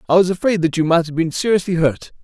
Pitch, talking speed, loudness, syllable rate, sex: 170 Hz, 270 wpm, -17 LUFS, 6.6 syllables/s, male